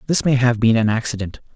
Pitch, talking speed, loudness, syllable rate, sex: 120 Hz, 230 wpm, -18 LUFS, 6.3 syllables/s, male